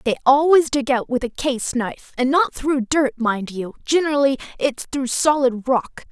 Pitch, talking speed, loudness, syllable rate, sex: 265 Hz, 185 wpm, -20 LUFS, 4.5 syllables/s, female